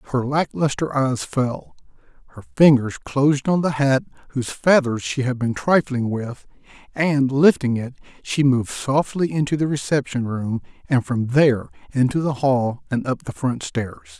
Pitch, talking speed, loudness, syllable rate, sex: 130 Hz, 165 wpm, -20 LUFS, 4.6 syllables/s, male